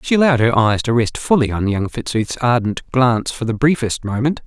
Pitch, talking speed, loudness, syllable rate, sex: 125 Hz, 215 wpm, -17 LUFS, 5.5 syllables/s, male